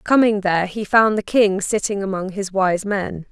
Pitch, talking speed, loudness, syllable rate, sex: 200 Hz, 200 wpm, -19 LUFS, 4.7 syllables/s, female